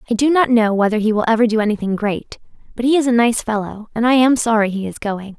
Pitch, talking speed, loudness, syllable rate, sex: 225 Hz, 265 wpm, -17 LUFS, 6.3 syllables/s, female